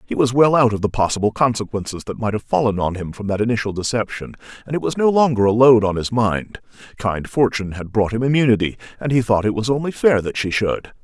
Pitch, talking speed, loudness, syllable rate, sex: 115 Hz, 240 wpm, -19 LUFS, 6.2 syllables/s, male